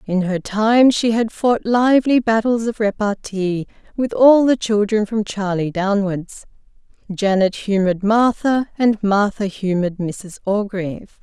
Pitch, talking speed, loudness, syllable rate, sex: 210 Hz, 135 wpm, -18 LUFS, 4.2 syllables/s, female